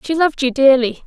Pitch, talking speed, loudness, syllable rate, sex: 270 Hz, 225 wpm, -14 LUFS, 6.2 syllables/s, female